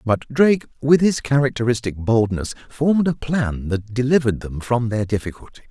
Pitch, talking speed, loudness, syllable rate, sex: 125 Hz, 160 wpm, -20 LUFS, 5.3 syllables/s, male